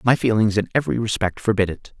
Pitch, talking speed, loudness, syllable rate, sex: 105 Hz, 210 wpm, -20 LUFS, 6.6 syllables/s, male